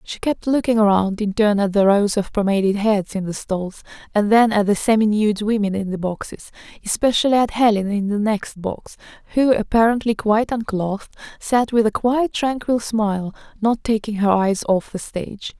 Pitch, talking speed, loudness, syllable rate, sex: 215 Hz, 180 wpm, -19 LUFS, 5.1 syllables/s, female